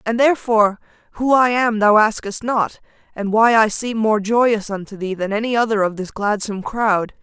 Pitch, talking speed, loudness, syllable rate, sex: 215 Hz, 190 wpm, -18 LUFS, 5.1 syllables/s, female